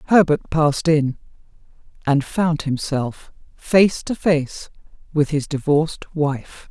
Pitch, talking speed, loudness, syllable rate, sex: 155 Hz, 105 wpm, -20 LUFS, 3.6 syllables/s, female